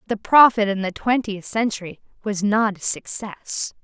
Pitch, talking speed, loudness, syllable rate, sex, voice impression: 210 Hz, 155 wpm, -20 LUFS, 4.5 syllables/s, female, very feminine, young, slightly adult-like, very thin, slightly tensed, slightly weak, very bright, slightly soft, very clear, very fluent, very cute, intellectual, very refreshing, sincere, very calm, very friendly, very reassuring, very unique, elegant, sweet, lively, slightly kind, slightly intense, slightly sharp, light